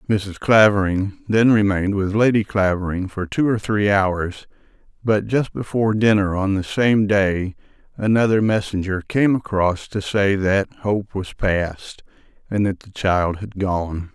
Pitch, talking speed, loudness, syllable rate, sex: 100 Hz, 155 wpm, -19 LUFS, 4.2 syllables/s, male